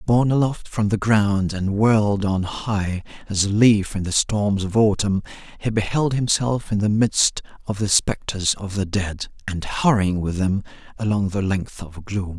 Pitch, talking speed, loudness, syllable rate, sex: 100 Hz, 185 wpm, -21 LUFS, 4.3 syllables/s, male